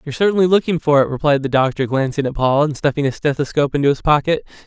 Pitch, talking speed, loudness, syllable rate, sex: 145 Hz, 230 wpm, -17 LUFS, 7.2 syllables/s, male